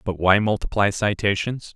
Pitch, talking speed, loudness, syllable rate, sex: 100 Hz, 135 wpm, -21 LUFS, 4.9 syllables/s, male